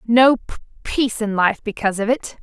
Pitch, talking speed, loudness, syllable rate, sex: 225 Hz, 175 wpm, -19 LUFS, 5.5 syllables/s, female